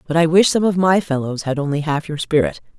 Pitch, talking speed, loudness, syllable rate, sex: 160 Hz, 260 wpm, -18 LUFS, 6.0 syllables/s, female